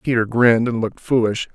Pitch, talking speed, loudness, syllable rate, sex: 115 Hz, 195 wpm, -18 LUFS, 6.3 syllables/s, male